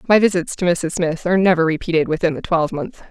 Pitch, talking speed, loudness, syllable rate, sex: 170 Hz, 210 wpm, -18 LUFS, 6.6 syllables/s, female